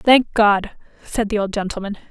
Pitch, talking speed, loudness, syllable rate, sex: 210 Hz, 170 wpm, -19 LUFS, 4.7 syllables/s, female